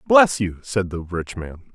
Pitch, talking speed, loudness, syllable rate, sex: 105 Hz, 205 wpm, -21 LUFS, 4.4 syllables/s, male